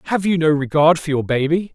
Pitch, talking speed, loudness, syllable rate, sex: 160 Hz, 240 wpm, -17 LUFS, 5.9 syllables/s, male